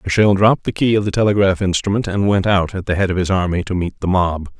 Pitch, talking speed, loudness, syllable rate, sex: 95 Hz, 275 wpm, -17 LUFS, 6.5 syllables/s, male